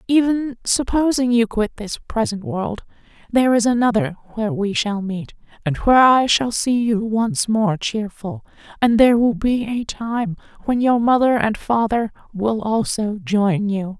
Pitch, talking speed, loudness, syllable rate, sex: 225 Hz, 165 wpm, -19 LUFS, 4.3 syllables/s, female